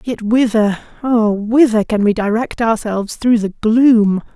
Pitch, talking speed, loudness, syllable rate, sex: 220 Hz, 140 wpm, -15 LUFS, 4.1 syllables/s, female